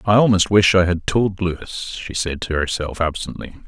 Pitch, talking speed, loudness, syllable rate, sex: 90 Hz, 195 wpm, -19 LUFS, 5.0 syllables/s, male